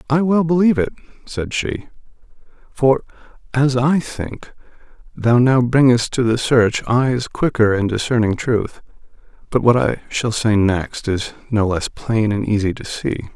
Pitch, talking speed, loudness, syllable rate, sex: 120 Hz, 155 wpm, -18 LUFS, 4.4 syllables/s, male